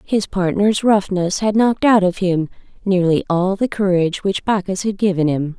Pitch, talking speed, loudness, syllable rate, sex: 190 Hz, 185 wpm, -17 LUFS, 4.9 syllables/s, female